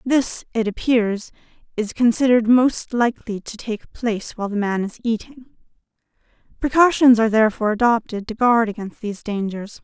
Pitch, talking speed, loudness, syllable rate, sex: 225 Hz, 145 wpm, -20 LUFS, 5.5 syllables/s, female